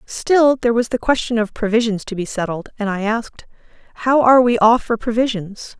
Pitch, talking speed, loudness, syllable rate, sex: 225 Hz, 185 wpm, -17 LUFS, 5.8 syllables/s, female